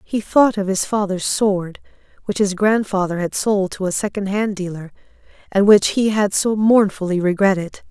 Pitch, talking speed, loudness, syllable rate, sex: 200 Hz, 165 wpm, -18 LUFS, 4.7 syllables/s, female